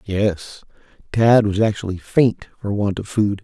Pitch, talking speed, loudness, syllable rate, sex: 105 Hz, 155 wpm, -19 LUFS, 4.1 syllables/s, male